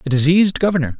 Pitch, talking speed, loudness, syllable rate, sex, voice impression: 165 Hz, 180 wpm, -15 LUFS, 8.1 syllables/s, male, very masculine, very adult-like, middle-aged, very thick, very relaxed, powerful, very dark, hard, very muffled, fluent, raspy, very cool, very intellectual, very sincere, very calm, very mature, friendly, reassuring, very unique, elegant, very sweet, very kind, slightly modest